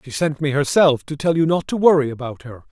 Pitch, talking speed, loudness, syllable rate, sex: 145 Hz, 265 wpm, -18 LUFS, 5.8 syllables/s, male